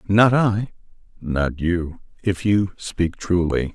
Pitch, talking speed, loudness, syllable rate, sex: 95 Hz, 130 wpm, -21 LUFS, 3.2 syllables/s, male